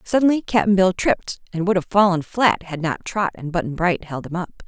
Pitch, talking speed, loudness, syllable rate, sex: 185 Hz, 230 wpm, -20 LUFS, 5.5 syllables/s, female